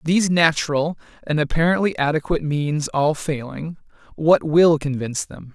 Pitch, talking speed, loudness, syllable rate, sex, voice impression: 155 Hz, 130 wpm, -20 LUFS, 5.0 syllables/s, male, masculine, adult-like, tensed, powerful, bright, clear, slightly muffled, cool, intellectual, calm, friendly, lively, light